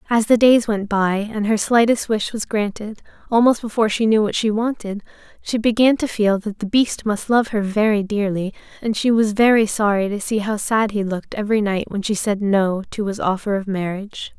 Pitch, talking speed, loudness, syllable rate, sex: 210 Hz, 215 wpm, -19 LUFS, 5.3 syllables/s, female